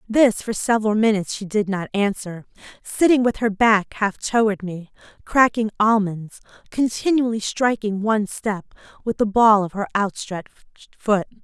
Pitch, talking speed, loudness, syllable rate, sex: 210 Hz, 145 wpm, -20 LUFS, 4.9 syllables/s, female